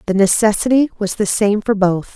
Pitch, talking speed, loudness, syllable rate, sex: 210 Hz, 195 wpm, -15 LUFS, 5.2 syllables/s, female